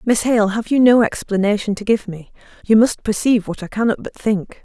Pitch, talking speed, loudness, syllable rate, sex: 215 Hz, 220 wpm, -17 LUFS, 5.5 syllables/s, female